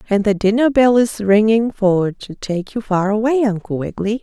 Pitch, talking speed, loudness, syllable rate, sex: 210 Hz, 200 wpm, -16 LUFS, 5.0 syllables/s, female